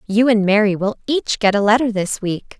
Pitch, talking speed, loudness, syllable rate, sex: 215 Hz, 230 wpm, -17 LUFS, 5.1 syllables/s, female